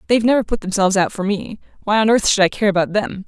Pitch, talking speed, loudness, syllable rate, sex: 205 Hz, 255 wpm, -17 LUFS, 7.1 syllables/s, female